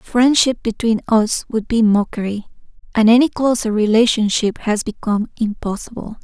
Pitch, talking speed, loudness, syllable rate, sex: 225 Hz, 125 wpm, -17 LUFS, 4.9 syllables/s, female